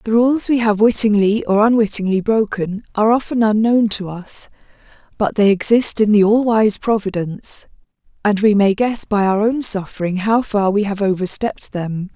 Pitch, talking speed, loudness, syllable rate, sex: 210 Hz, 175 wpm, -16 LUFS, 5.0 syllables/s, female